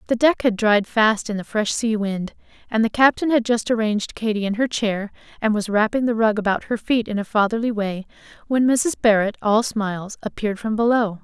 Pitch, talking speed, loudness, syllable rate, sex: 220 Hz, 215 wpm, -20 LUFS, 5.4 syllables/s, female